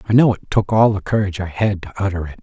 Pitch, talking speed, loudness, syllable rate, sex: 100 Hz, 295 wpm, -18 LUFS, 6.9 syllables/s, male